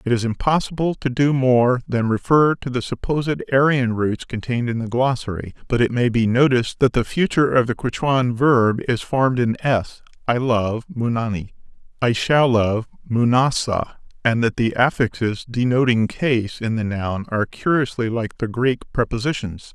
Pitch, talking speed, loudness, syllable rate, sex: 120 Hz, 160 wpm, -20 LUFS, 5.0 syllables/s, male